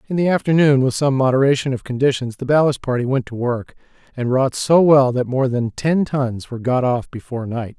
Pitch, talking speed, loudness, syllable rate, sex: 130 Hz, 215 wpm, -18 LUFS, 5.5 syllables/s, male